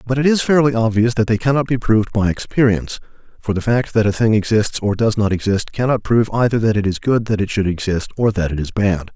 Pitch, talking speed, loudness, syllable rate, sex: 110 Hz, 255 wpm, -17 LUFS, 6.2 syllables/s, male